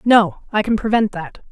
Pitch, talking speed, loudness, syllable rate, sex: 210 Hz, 200 wpm, -18 LUFS, 4.7 syllables/s, female